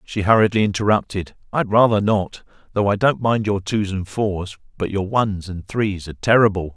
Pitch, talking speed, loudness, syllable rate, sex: 100 Hz, 185 wpm, -19 LUFS, 5.0 syllables/s, male